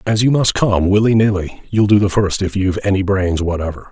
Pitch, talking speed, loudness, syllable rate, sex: 100 Hz, 230 wpm, -15 LUFS, 5.7 syllables/s, male